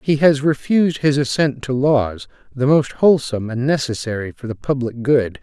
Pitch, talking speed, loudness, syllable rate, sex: 135 Hz, 175 wpm, -18 LUFS, 5.1 syllables/s, male